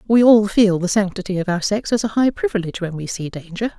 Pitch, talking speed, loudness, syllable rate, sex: 200 Hz, 255 wpm, -18 LUFS, 6.0 syllables/s, female